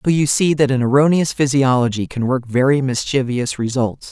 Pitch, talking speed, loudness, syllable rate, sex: 135 Hz, 175 wpm, -17 LUFS, 5.2 syllables/s, female